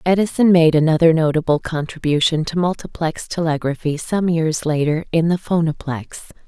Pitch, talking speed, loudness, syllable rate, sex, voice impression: 160 Hz, 130 wpm, -18 LUFS, 5.1 syllables/s, female, feminine, adult-like, tensed, powerful, clear, fluent, intellectual, calm, reassuring, elegant, slightly lively